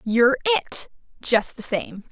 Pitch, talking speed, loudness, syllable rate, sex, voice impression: 250 Hz, 140 wpm, -21 LUFS, 4.6 syllables/s, female, feminine, adult-like, tensed, powerful, clear, fluent, intellectual, elegant, lively, slightly strict, intense, sharp